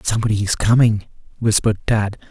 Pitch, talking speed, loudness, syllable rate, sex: 110 Hz, 130 wpm, -18 LUFS, 6.5 syllables/s, male